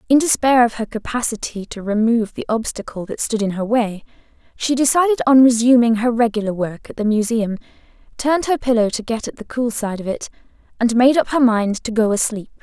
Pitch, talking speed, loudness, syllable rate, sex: 230 Hz, 195 wpm, -18 LUFS, 5.7 syllables/s, female